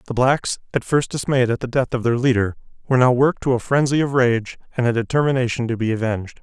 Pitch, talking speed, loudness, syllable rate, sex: 125 Hz, 235 wpm, -20 LUFS, 6.4 syllables/s, male